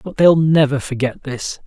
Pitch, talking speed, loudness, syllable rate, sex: 145 Hz, 180 wpm, -16 LUFS, 4.6 syllables/s, male